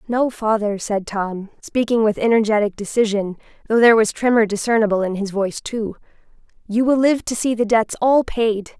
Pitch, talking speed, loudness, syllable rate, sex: 220 Hz, 175 wpm, -19 LUFS, 5.3 syllables/s, female